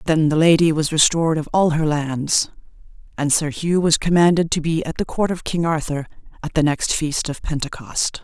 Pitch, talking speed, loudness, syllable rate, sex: 160 Hz, 205 wpm, -19 LUFS, 5.1 syllables/s, female